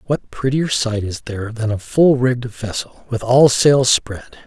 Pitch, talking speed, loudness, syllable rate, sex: 120 Hz, 190 wpm, -17 LUFS, 4.5 syllables/s, male